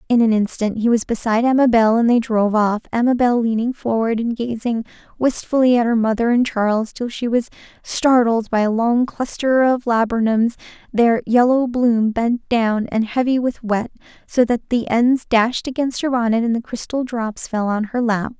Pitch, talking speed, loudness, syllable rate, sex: 235 Hz, 185 wpm, -18 LUFS, 4.9 syllables/s, female